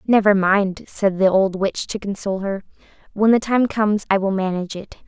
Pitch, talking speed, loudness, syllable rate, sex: 200 Hz, 200 wpm, -19 LUFS, 5.4 syllables/s, female